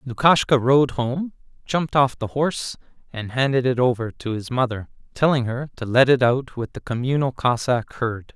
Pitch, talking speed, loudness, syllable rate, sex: 130 Hz, 180 wpm, -21 LUFS, 4.9 syllables/s, male